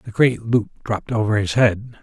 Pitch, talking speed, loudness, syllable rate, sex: 110 Hz, 205 wpm, -20 LUFS, 4.9 syllables/s, male